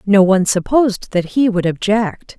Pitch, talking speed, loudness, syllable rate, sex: 200 Hz, 175 wpm, -15 LUFS, 4.8 syllables/s, female